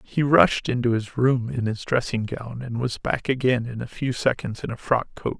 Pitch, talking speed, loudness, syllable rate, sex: 120 Hz, 235 wpm, -24 LUFS, 4.8 syllables/s, male